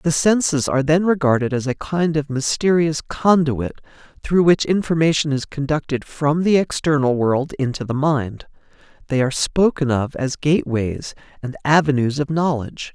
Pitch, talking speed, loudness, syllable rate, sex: 145 Hz, 155 wpm, -19 LUFS, 4.9 syllables/s, male